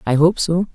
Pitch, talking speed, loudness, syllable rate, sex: 170 Hz, 240 wpm, -17 LUFS, 5.1 syllables/s, female